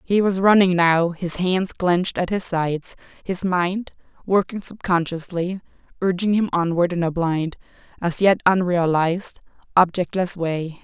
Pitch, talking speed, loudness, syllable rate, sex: 180 Hz, 140 wpm, -21 LUFS, 4.4 syllables/s, female